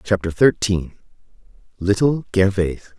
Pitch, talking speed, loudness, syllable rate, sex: 100 Hz, 60 wpm, -19 LUFS, 4.4 syllables/s, male